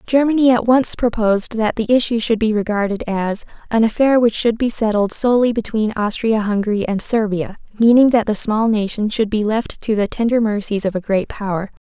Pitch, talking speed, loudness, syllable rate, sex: 220 Hz, 195 wpm, -17 LUFS, 5.4 syllables/s, female